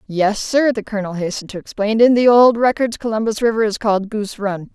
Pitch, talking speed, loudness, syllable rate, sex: 215 Hz, 215 wpm, -17 LUFS, 6.1 syllables/s, female